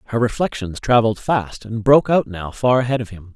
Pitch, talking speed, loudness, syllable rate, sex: 115 Hz, 215 wpm, -18 LUFS, 5.8 syllables/s, male